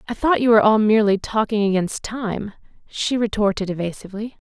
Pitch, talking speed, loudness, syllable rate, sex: 210 Hz, 160 wpm, -19 LUFS, 5.9 syllables/s, female